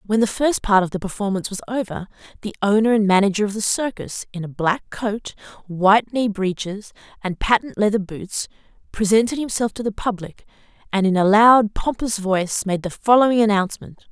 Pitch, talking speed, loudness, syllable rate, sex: 210 Hz, 180 wpm, -20 LUFS, 5.5 syllables/s, female